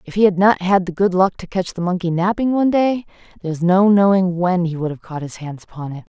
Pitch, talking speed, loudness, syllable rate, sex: 185 Hz, 275 wpm, -17 LUFS, 6.1 syllables/s, female